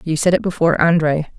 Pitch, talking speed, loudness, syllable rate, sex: 165 Hz, 215 wpm, -16 LUFS, 6.7 syllables/s, female